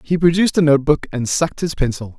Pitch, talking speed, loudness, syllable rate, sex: 150 Hz, 220 wpm, -17 LUFS, 6.9 syllables/s, male